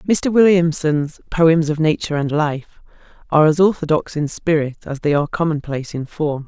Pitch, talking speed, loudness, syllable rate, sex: 155 Hz, 165 wpm, -18 LUFS, 5.4 syllables/s, female